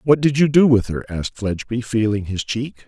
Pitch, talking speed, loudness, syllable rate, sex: 115 Hz, 230 wpm, -19 LUFS, 5.6 syllables/s, male